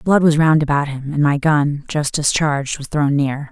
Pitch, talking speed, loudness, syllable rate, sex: 145 Hz, 220 wpm, -17 LUFS, 4.8 syllables/s, female